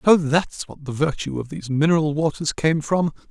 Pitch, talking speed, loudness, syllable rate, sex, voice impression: 150 Hz, 200 wpm, -21 LUFS, 5.2 syllables/s, male, masculine, very adult-like, slightly thick, cool, intellectual, calm, slightly elegant